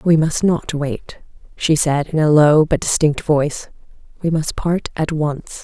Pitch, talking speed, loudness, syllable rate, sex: 155 Hz, 180 wpm, -17 LUFS, 4.1 syllables/s, female